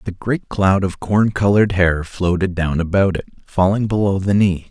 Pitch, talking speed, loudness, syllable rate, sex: 95 Hz, 190 wpm, -17 LUFS, 4.9 syllables/s, male